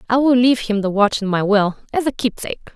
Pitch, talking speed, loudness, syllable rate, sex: 225 Hz, 260 wpm, -17 LUFS, 6.5 syllables/s, female